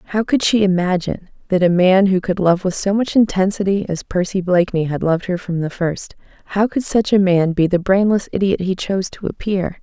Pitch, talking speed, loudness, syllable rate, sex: 185 Hz, 215 wpm, -17 LUFS, 5.6 syllables/s, female